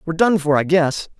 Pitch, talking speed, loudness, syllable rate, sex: 165 Hz, 250 wpm, -17 LUFS, 5.9 syllables/s, male